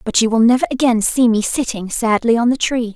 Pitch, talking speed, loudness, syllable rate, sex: 230 Hz, 245 wpm, -16 LUFS, 5.7 syllables/s, female